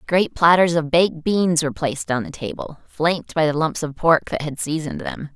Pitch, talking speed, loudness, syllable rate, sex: 160 Hz, 225 wpm, -20 LUFS, 5.5 syllables/s, female